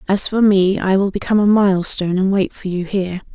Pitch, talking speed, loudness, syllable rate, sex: 195 Hz, 235 wpm, -16 LUFS, 6.2 syllables/s, female